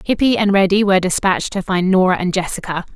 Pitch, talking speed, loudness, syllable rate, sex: 190 Hz, 205 wpm, -16 LUFS, 6.5 syllables/s, female